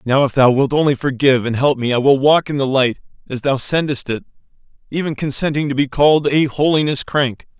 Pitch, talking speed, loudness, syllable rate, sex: 135 Hz, 215 wpm, -16 LUFS, 5.8 syllables/s, male